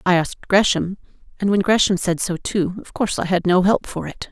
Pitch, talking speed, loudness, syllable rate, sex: 190 Hz, 235 wpm, -19 LUFS, 5.8 syllables/s, female